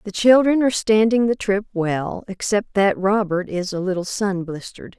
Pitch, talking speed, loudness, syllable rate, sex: 200 Hz, 180 wpm, -19 LUFS, 4.8 syllables/s, female